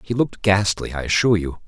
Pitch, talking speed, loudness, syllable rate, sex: 100 Hz, 215 wpm, -20 LUFS, 6.5 syllables/s, male